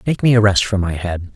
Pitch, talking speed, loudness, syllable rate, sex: 100 Hz, 310 wpm, -16 LUFS, 5.7 syllables/s, male